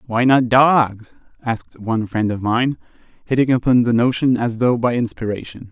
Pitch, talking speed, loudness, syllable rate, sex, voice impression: 120 Hz, 170 wpm, -18 LUFS, 5.0 syllables/s, male, masculine, adult-like, tensed, bright, soft, slightly raspy, cool, intellectual, friendly, reassuring, wild, lively, kind